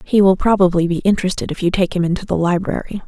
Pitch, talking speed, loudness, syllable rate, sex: 185 Hz, 235 wpm, -17 LUFS, 6.8 syllables/s, female